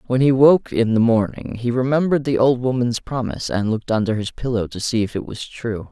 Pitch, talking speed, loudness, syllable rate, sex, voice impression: 115 Hz, 235 wpm, -19 LUFS, 5.8 syllables/s, male, very masculine, slightly young, slightly adult-like, very thick, slightly tensed, slightly relaxed, slightly weak, dark, hard, muffled, slightly halting, cool, intellectual, slightly refreshing, sincere, calm, mature, slightly friendly, slightly reassuring, very unique, wild, slightly sweet, slightly lively, kind